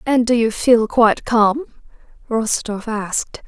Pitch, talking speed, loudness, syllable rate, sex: 225 Hz, 140 wpm, -17 LUFS, 4.1 syllables/s, female